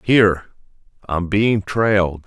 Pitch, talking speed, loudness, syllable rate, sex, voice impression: 95 Hz, 105 wpm, -18 LUFS, 3.7 syllables/s, male, masculine, middle-aged, thick, tensed, powerful, slightly hard, clear, cool, calm, mature, reassuring, wild, lively